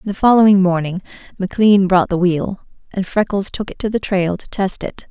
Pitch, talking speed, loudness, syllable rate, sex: 190 Hz, 200 wpm, -16 LUFS, 5.2 syllables/s, female